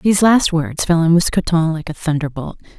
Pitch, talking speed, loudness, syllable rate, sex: 165 Hz, 195 wpm, -16 LUFS, 5.5 syllables/s, female